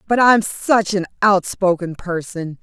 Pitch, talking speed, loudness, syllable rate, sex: 190 Hz, 135 wpm, -17 LUFS, 3.9 syllables/s, female